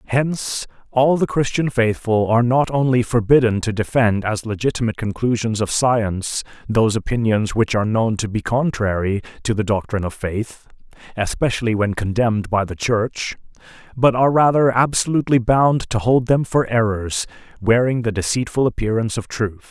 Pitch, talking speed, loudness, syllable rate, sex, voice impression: 115 Hz, 155 wpm, -19 LUFS, 5.3 syllables/s, male, masculine, adult-like, tensed, powerful, hard, clear, fluent, cool, intellectual, friendly, lively